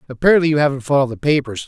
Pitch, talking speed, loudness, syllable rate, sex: 140 Hz, 215 wpm, -16 LUFS, 8.7 syllables/s, male